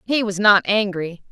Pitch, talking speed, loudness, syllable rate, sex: 200 Hz, 185 wpm, -17 LUFS, 4.4 syllables/s, female